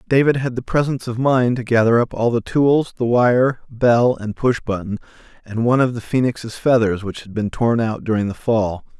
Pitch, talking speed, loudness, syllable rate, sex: 120 Hz, 205 wpm, -18 LUFS, 5.0 syllables/s, male